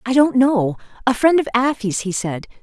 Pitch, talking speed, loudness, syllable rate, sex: 235 Hz, 205 wpm, -18 LUFS, 4.9 syllables/s, female